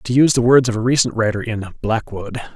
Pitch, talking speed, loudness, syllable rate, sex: 115 Hz, 235 wpm, -17 LUFS, 6.2 syllables/s, male